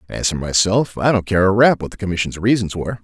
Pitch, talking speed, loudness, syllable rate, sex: 100 Hz, 255 wpm, -17 LUFS, 6.3 syllables/s, male